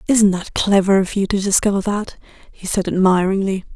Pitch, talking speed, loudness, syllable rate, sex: 195 Hz, 175 wpm, -17 LUFS, 5.2 syllables/s, female